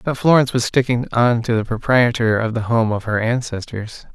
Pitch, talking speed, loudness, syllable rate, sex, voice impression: 115 Hz, 205 wpm, -18 LUFS, 5.3 syllables/s, male, masculine, adult-like, slightly tensed, bright, slightly muffled, slightly raspy, intellectual, sincere, calm, wild, lively, slightly modest